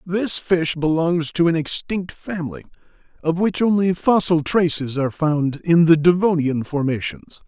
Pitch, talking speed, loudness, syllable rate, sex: 165 Hz, 145 wpm, -19 LUFS, 4.5 syllables/s, male